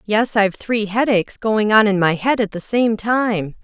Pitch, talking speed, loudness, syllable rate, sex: 215 Hz, 215 wpm, -17 LUFS, 4.6 syllables/s, female